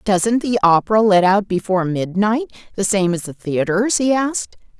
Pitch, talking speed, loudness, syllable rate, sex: 200 Hz, 175 wpm, -17 LUFS, 5.1 syllables/s, female